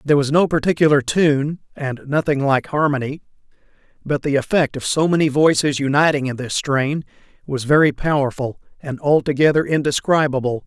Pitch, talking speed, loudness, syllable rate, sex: 145 Hz, 145 wpm, -18 LUFS, 5.4 syllables/s, male